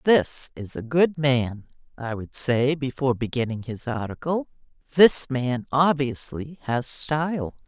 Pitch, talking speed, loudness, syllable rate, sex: 135 Hz, 135 wpm, -23 LUFS, 4.0 syllables/s, female